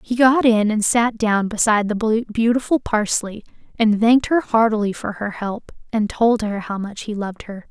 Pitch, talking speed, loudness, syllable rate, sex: 220 Hz, 195 wpm, -19 LUFS, 4.8 syllables/s, female